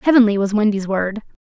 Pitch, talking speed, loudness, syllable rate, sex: 210 Hz, 170 wpm, -18 LUFS, 6.0 syllables/s, female